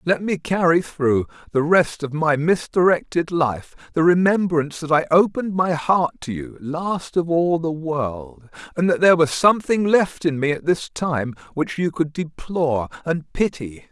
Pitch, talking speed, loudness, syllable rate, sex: 160 Hz, 175 wpm, -20 LUFS, 4.5 syllables/s, male